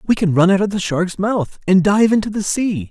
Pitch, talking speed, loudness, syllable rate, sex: 195 Hz, 270 wpm, -16 LUFS, 5.2 syllables/s, male